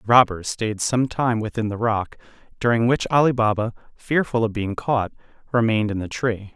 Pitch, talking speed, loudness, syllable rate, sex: 115 Hz, 185 wpm, -22 LUFS, 5.2 syllables/s, male